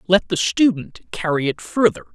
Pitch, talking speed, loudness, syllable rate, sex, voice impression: 170 Hz, 170 wpm, -19 LUFS, 4.9 syllables/s, male, masculine, adult-like, tensed, powerful, bright, clear, fluent, intellectual, friendly, wild, lively, slightly strict